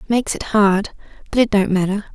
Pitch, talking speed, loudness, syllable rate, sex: 205 Hz, 195 wpm, -18 LUFS, 5.7 syllables/s, female